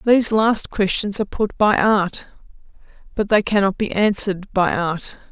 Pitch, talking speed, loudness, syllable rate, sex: 200 Hz, 160 wpm, -19 LUFS, 4.8 syllables/s, female